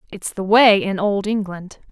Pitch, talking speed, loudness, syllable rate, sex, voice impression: 200 Hz, 190 wpm, -17 LUFS, 4.3 syllables/s, female, feminine, slightly young, tensed, slightly bright, clear, fluent, slightly cute, slightly intellectual, slightly elegant, lively, slightly sharp